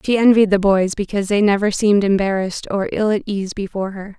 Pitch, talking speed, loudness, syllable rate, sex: 200 Hz, 215 wpm, -17 LUFS, 6.3 syllables/s, female